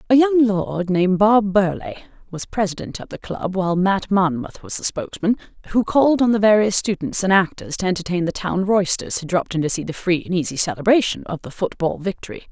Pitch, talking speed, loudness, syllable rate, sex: 190 Hz, 210 wpm, -19 LUFS, 5.9 syllables/s, female